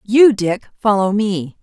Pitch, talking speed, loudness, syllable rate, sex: 210 Hz, 150 wpm, -16 LUFS, 3.7 syllables/s, female